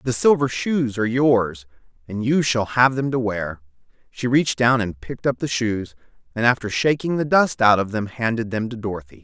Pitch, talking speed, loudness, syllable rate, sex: 115 Hz, 215 wpm, -20 LUFS, 5.3 syllables/s, male